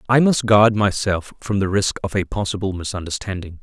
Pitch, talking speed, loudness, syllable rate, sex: 100 Hz, 180 wpm, -19 LUFS, 5.4 syllables/s, male